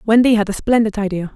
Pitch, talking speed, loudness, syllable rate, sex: 215 Hz, 220 wpm, -16 LUFS, 6.5 syllables/s, female